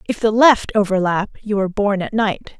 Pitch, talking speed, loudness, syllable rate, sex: 205 Hz, 210 wpm, -17 LUFS, 5.4 syllables/s, female